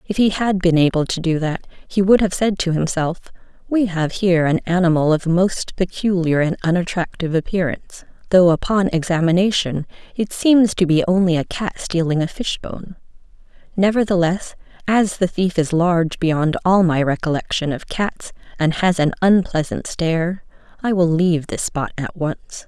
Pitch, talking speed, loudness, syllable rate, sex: 175 Hz, 165 wpm, -18 LUFS, 4.9 syllables/s, female